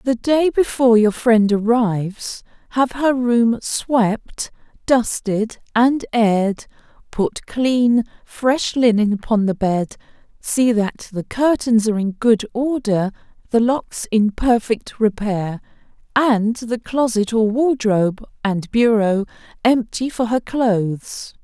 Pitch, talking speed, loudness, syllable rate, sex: 230 Hz, 125 wpm, -18 LUFS, 3.6 syllables/s, female